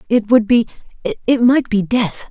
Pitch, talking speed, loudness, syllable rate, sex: 230 Hz, 130 wpm, -15 LUFS, 4.4 syllables/s, female